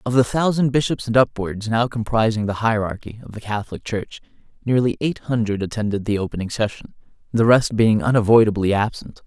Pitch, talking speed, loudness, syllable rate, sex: 115 Hz, 170 wpm, -20 LUFS, 5.7 syllables/s, male